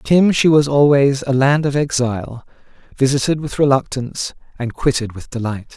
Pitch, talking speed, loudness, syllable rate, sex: 135 Hz, 165 wpm, -17 LUFS, 5.3 syllables/s, male